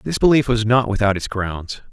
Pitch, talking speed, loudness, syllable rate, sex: 110 Hz, 220 wpm, -18 LUFS, 5.0 syllables/s, male